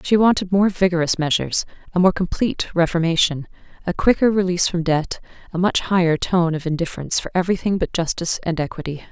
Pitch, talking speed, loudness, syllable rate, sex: 175 Hz, 170 wpm, -20 LUFS, 6.5 syllables/s, female